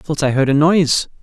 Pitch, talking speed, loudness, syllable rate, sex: 150 Hz, 245 wpm, -15 LUFS, 5.6 syllables/s, male